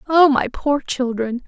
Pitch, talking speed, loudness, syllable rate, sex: 265 Hz, 160 wpm, -18 LUFS, 3.9 syllables/s, female